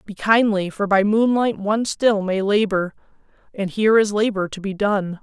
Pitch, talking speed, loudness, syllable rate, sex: 205 Hz, 185 wpm, -19 LUFS, 4.9 syllables/s, female